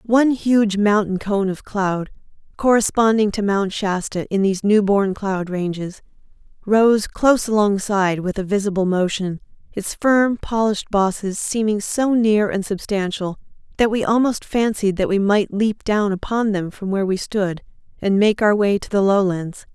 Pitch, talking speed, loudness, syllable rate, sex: 205 Hz, 160 wpm, -19 LUFS, 4.6 syllables/s, female